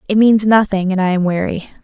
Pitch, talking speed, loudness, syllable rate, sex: 200 Hz, 230 wpm, -14 LUFS, 5.8 syllables/s, female